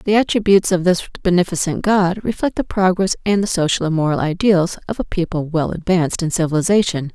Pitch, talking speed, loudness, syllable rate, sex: 180 Hz, 185 wpm, -17 LUFS, 6.1 syllables/s, female